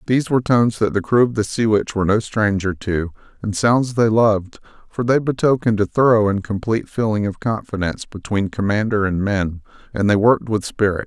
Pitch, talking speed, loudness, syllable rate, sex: 105 Hz, 200 wpm, -18 LUFS, 5.9 syllables/s, male